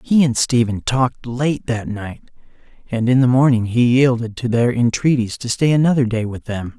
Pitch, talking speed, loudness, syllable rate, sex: 120 Hz, 195 wpm, -17 LUFS, 5.0 syllables/s, male